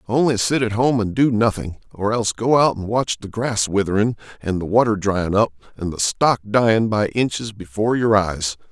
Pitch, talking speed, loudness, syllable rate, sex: 110 Hz, 205 wpm, -19 LUFS, 5.1 syllables/s, male